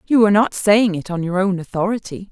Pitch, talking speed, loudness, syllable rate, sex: 195 Hz, 235 wpm, -17 LUFS, 6.1 syllables/s, female